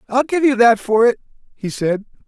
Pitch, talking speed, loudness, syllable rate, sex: 235 Hz, 210 wpm, -16 LUFS, 5.1 syllables/s, male